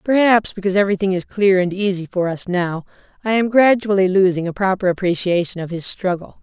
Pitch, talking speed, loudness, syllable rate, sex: 190 Hz, 185 wpm, -18 LUFS, 5.9 syllables/s, female